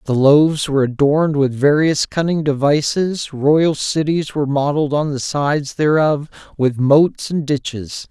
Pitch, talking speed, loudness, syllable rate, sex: 145 Hz, 150 wpm, -16 LUFS, 4.6 syllables/s, male